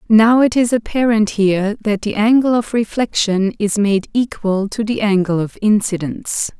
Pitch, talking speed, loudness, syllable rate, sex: 215 Hz, 165 wpm, -16 LUFS, 4.7 syllables/s, female